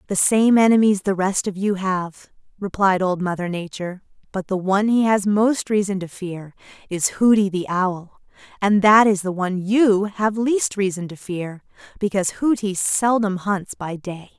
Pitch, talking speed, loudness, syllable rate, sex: 195 Hz, 175 wpm, -20 LUFS, 4.6 syllables/s, female